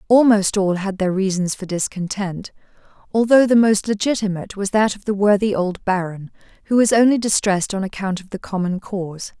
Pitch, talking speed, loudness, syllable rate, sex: 200 Hz, 180 wpm, -19 LUFS, 5.5 syllables/s, female